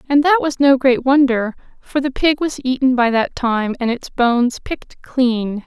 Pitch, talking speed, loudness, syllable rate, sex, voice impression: 260 Hz, 200 wpm, -17 LUFS, 4.5 syllables/s, female, feminine, slightly adult-like, slightly muffled, slightly intellectual, slightly calm, friendly, slightly sweet